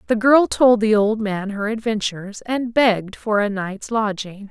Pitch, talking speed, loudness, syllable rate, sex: 215 Hz, 185 wpm, -19 LUFS, 4.4 syllables/s, female